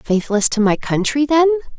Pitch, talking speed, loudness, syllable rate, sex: 255 Hz, 170 wpm, -16 LUFS, 4.8 syllables/s, female